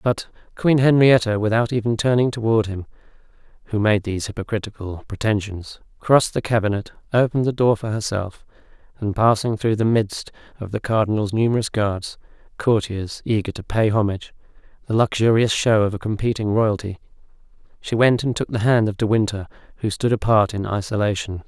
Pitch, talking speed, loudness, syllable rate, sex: 110 Hz, 160 wpm, -20 LUFS, 5.6 syllables/s, male